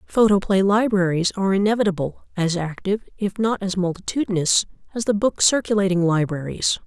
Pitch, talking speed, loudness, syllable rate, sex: 195 Hz, 130 wpm, -21 LUFS, 5.7 syllables/s, female